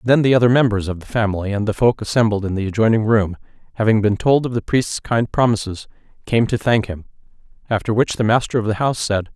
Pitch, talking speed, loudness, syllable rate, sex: 110 Hz, 220 wpm, -18 LUFS, 6.3 syllables/s, male